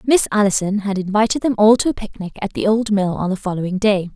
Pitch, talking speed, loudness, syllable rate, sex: 205 Hz, 245 wpm, -18 LUFS, 6.2 syllables/s, female